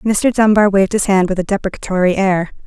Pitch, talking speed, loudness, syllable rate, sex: 195 Hz, 205 wpm, -15 LUFS, 6.1 syllables/s, female